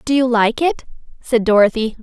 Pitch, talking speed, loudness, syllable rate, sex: 235 Hz, 180 wpm, -16 LUFS, 5.2 syllables/s, female